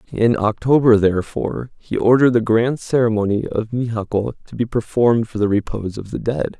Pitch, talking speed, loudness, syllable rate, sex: 115 Hz, 175 wpm, -18 LUFS, 5.7 syllables/s, male